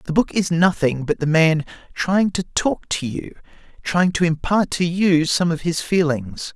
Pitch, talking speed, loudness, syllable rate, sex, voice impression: 170 Hz, 190 wpm, -19 LUFS, 4.3 syllables/s, male, masculine, adult-like, slightly muffled, fluent, slightly sincere, calm, reassuring